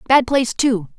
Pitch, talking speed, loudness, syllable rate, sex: 245 Hz, 185 wpm, -17 LUFS, 5.3 syllables/s, female